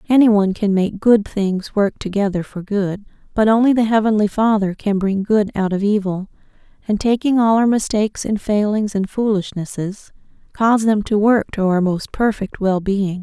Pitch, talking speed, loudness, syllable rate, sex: 205 Hz, 175 wpm, -18 LUFS, 4.9 syllables/s, female